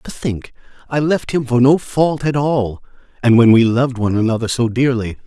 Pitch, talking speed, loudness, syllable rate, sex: 125 Hz, 205 wpm, -16 LUFS, 5.3 syllables/s, male